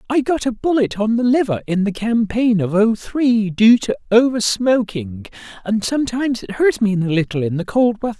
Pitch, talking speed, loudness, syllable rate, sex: 220 Hz, 205 wpm, -17 LUFS, 5.1 syllables/s, male